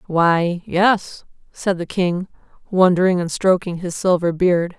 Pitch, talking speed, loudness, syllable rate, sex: 180 Hz, 140 wpm, -18 LUFS, 3.8 syllables/s, female